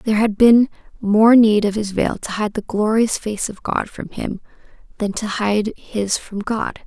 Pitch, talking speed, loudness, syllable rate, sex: 215 Hz, 200 wpm, -18 LUFS, 4.3 syllables/s, female